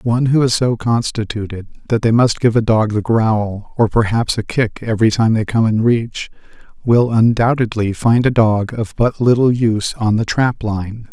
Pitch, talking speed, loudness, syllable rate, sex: 115 Hz, 195 wpm, -16 LUFS, 4.7 syllables/s, male